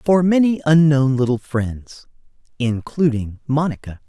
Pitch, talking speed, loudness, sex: 140 Hz, 105 wpm, -18 LUFS, male